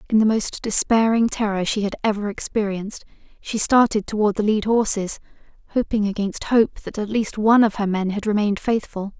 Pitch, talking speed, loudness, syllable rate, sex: 210 Hz, 185 wpm, -20 LUFS, 5.5 syllables/s, female